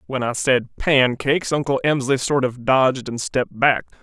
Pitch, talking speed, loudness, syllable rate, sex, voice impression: 130 Hz, 180 wpm, -19 LUFS, 5.0 syllables/s, male, masculine, adult-like, slightly thick, tensed, powerful, clear, fluent, cool, sincere, slightly mature, unique, wild, strict, sharp